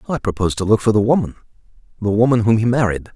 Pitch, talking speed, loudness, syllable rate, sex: 110 Hz, 230 wpm, -17 LUFS, 7.4 syllables/s, male